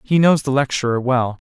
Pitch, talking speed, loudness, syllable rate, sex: 130 Hz, 205 wpm, -18 LUFS, 5.3 syllables/s, male